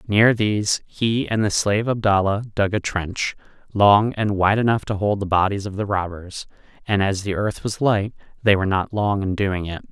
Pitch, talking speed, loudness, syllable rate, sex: 100 Hz, 205 wpm, -20 LUFS, 4.9 syllables/s, male